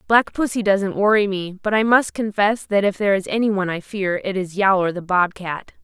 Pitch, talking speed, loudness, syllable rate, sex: 200 Hz, 235 wpm, -19 LUFS, 5.4 syllables/s, female